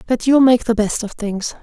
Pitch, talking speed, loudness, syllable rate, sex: 230 Hz, 260 wpm, -16 LUFS, 4.9 syllables/s, female